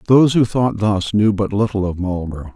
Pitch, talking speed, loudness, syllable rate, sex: 105 Hz, 210 wpm, -17 LUFS, 5.5 syllables/s, male